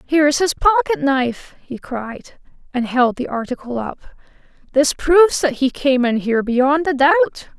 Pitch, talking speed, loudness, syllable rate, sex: 275 Hz, 165 wpm, -17 LUFS, 4.8 syllables/s, female